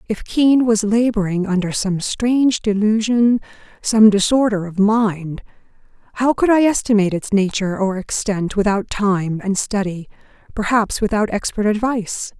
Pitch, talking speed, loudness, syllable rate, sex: 210 Hz, 135 wpm, -17 LUFS, 4.7 syllables/s, female